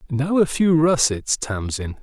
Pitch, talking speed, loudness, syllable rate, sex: 140 Hz, 150 wpm, -20 LUFS, 4.0 syllables/s, male